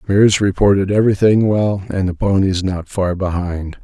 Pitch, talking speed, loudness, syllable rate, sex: 95 Hz, 155 wpm, -16 LUFS, 5.0 syllables/s, male